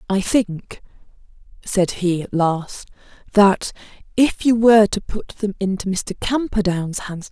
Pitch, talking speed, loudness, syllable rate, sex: 200 Hz, 140 wpm, -19 LUFS, 3.9 syllables/s, female